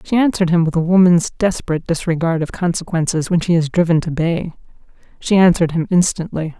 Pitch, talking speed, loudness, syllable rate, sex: 170 Hz, 175 wpm, -16 LUFS, 6.2 syllables/s, female